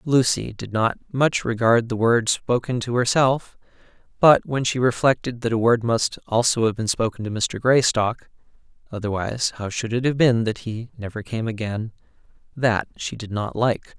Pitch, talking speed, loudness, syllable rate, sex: 115 Hz, 165 wpm, -22 LUFS, 4.8 syllables/s, male